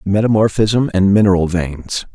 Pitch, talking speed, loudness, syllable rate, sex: 100 Hz, 110 wpm, -15 LUFS, 4.6 syllables/s, male